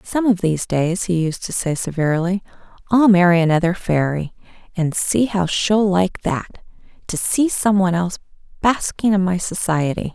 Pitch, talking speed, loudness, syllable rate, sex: 185 Hz, 155 wpm, -18 LUFS, 5.1 syllables/s, female